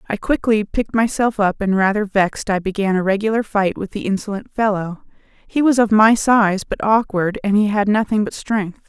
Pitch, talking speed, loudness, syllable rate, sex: 205 Hz, 205 wpm, -18 LUFS, 5.1 syllables/s, female